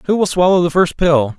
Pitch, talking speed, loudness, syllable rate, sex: 170 Hz, 260 wpm, -14 LUFS, 5.7 syllables/s, male